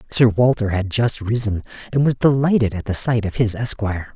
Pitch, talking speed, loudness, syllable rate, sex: 110 Hz, 200 wpm, -19 LUFS, 5.5 syllables/s, male